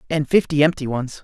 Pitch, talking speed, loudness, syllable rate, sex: 150 Hz, 195 wpm, -19 LUFS, 5.8 syllables/s, male